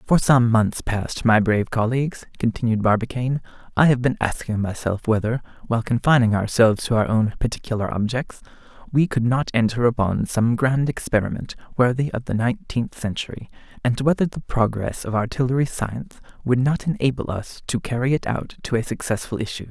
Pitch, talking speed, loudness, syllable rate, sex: 120 Hz, 165 wpm, -22 LUFS, 5.6 syllables/s, male